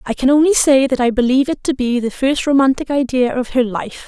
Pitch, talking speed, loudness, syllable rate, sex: 265 Hz, 250 wpm, -15 LUFS, 5.8 syllables/s, female